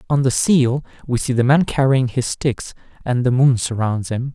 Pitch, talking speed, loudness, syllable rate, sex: 125 Hz, 205 wpm, -18 LUFS, 4.6 syllables/s, male